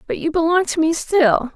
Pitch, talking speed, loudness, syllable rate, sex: 320 Hz, 230 wpm, -17 LUFS, 5.0 syllables/s, female